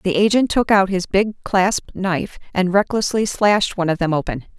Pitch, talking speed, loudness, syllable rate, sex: 195 Hz, 195 wpm, -18 LUFS, 5.2 syllables/s, female